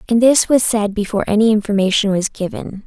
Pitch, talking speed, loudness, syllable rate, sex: 210 Hz, 190 wpm, -15 LUFS, 6.0 syllables/s, female